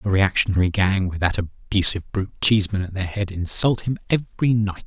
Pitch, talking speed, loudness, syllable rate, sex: 100 Hz, 185 wpm, -21 LUFS, 5.8 syllables/s, male